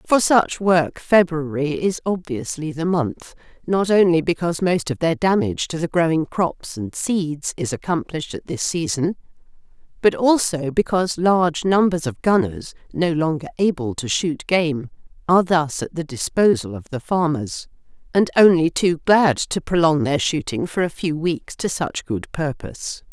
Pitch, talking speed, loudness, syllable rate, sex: 165 Hz, 165 wpm, -20 LUFS, 4.6 syllables/s, female